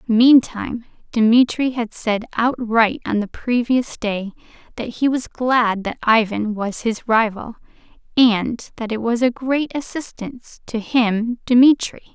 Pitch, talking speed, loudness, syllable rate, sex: 230 Hz, 140 wpm, -19 LUFS, 3.8 syllables/s, female